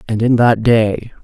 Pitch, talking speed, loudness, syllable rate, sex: 115 Hz, 195 wpm, -13 LUFS, 4.0 syllables/s, female